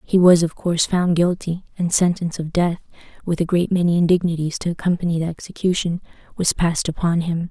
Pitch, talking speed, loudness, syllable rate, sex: 170 Hz, 170 wpm, -20 LUFS, 6.0 syllables/s, female